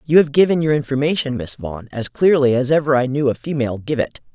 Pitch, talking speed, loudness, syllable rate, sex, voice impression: 135 Hz, 235 wpm, -18 LUFS, 6.3 syllables/s, female, very feminine, middle-aged, slightly thin, tensed, slightly powerful, bright, soft, clear, fluent, slightly raspy, cool, very intellectual, very refreshing, sincere, very calm, very friendly, very reassuring, unique, elegant, wild, slightly sweet, lively, strict, slightly intense, slightly sharp